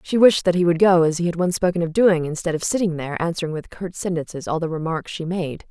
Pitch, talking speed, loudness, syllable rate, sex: 170 Hz, 275 wpm, -21 LUFS, 6.3 syllables/s, female